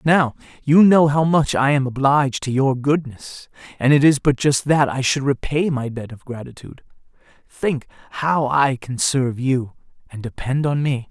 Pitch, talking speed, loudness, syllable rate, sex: 135 Hz, 185 wpm, -18 LUFS, 4.7 syllables/s, male